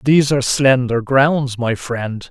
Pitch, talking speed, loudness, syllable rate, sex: 130 Hz, 155 wpm, -16 LUFS, 4.2 syllables/s, male